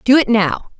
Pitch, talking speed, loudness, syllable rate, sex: 235 Hz, 230 wpm, -15 LUFS, 4.6 syllables/s, female